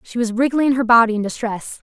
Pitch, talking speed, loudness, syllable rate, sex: 235 Hz, 220 wpm, -17 LUFS, 5.8 syllables/s, female